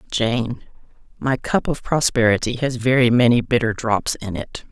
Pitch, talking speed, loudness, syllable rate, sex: 120 Hz, 155 wpm, -19 LUFS, 4.6 syllables/s, female